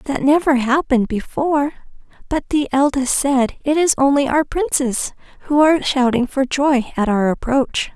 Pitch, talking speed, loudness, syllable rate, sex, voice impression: 270 Hz, 160 wpm, -17 LUFS, 4.7 syllables/s, female, very feminine, adult-like, slightly bright, slightly cute, slightly refreshing, friendly